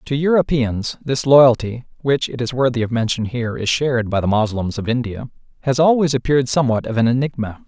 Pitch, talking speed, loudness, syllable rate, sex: 125 Hz, 195 wpm, -18 LUFS, 5.8 syllables/s, male